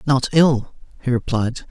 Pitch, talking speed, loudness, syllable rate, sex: 130 Hz, 140 wpm, -19 LUFS, 4.2 syllables/s, male